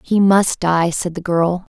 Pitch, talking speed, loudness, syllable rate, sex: 180 Hz, 205 wpm, -17 LUFS, 3.8 syllables/s, female